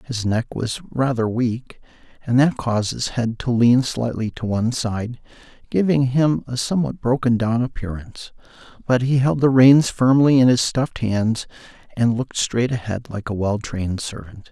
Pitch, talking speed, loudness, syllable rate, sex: 120 Hz, 175 wpm, -20 LUFS, 4.8 syllables/s, male